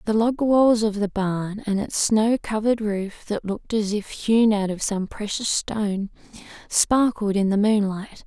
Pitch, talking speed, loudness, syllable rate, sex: 210 Hz, 180 wpm, -22 LUFS, 4.3 syllables/s, female